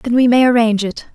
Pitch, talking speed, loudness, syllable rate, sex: 235 Hz, 260 wpm, -13 LUFS, 6.7 syllables/s, female